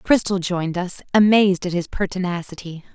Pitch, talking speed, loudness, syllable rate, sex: 185 Hz, 145 wpm, -20 LUFS, 5.7 syllables/s, female